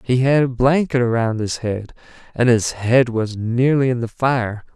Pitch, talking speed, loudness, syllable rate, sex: 120 Hz, 190 wpm, -18 LUFS, 4.3 syllables/s, male